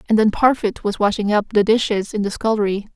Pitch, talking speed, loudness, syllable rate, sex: 210 Hz, 225 wpm, -18 LUFS, 6.1 syllables/s, female